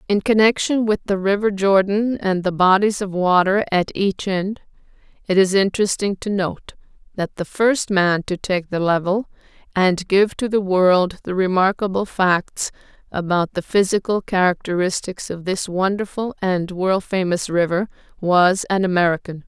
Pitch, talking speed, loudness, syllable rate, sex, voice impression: 190 Hz, 150 wpm, -19 LUFS, 4.5 syllables/s, female, feminine, middle-aged, tensed, powerful, slightly hard, raspy, intellectual, calm, slightly reassuring, elegant, lively, slightly sharp